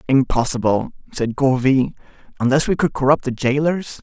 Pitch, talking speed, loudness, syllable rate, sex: 135 Hz, 135 wpm, -18 LUFS, 5.3 syllables/s, male